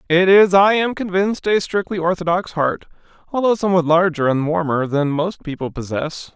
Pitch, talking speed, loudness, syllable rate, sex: 175 Hz, 170 wpm, -18 LUFS, 5.3 syllables/s, male